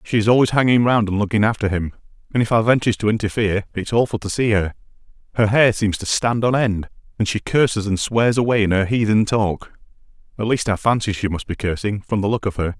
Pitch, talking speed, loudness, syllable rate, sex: 105 Hz, 230 wpm, -19 LUFS, 6.1 syllables/s, male